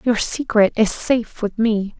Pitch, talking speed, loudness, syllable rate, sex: 225 Hz, 180 wpm, -18 LUFS, 4.3 syllables/s, female